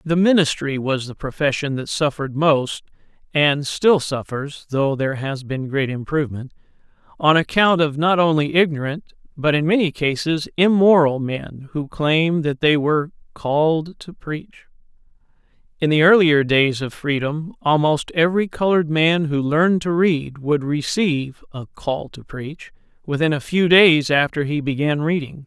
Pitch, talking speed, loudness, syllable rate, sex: 150 Hz, 150 wpm, -19 LUFS, 4.6 syllables/s, male